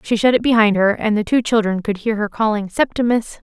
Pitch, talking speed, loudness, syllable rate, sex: 215 Hz, 240 wpm, -17 LUFS, 5.7 syllables/s, female